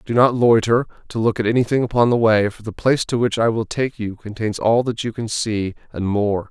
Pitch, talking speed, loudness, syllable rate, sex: 110 Hz, 250 wpm, -19 LUFS, 5.5 syllables/s, male